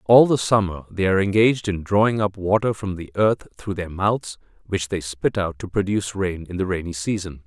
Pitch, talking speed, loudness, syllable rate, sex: 95 Hz, 215 wpm, -22 LUFS, 5.4 syllables/s, male